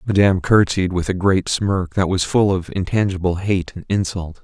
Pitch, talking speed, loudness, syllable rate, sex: 95 Hz, 190 wpm, -19 LUFS, 5.2 syllables/s, male